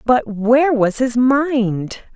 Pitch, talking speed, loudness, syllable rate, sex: 240 Hz, 140 wpm, -16 LUFS, 3.0 syllables/s, female